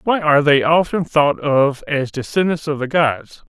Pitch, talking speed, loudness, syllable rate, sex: 150 Hz, 190 wpm, -17 LUFS, 4.5 syllables/s, male